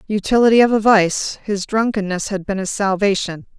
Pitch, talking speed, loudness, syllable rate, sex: 205 Hz, 165 wpm, -17 LUFS, 5.2 syllables/s, female